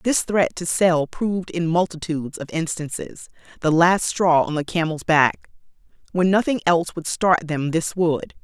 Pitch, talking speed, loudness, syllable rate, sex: 170 Hz, 170 wpm, -21 LUFS, 4.6 syllables/s, female